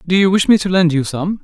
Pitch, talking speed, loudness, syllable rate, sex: 175 Hz, 335 wpm, -14 LUFS, 6.2 syllables/s, male